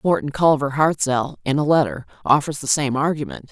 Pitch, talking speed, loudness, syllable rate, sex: 145 Hz, 170 wpm, -20 LUFS, 5.5 syllables/s, female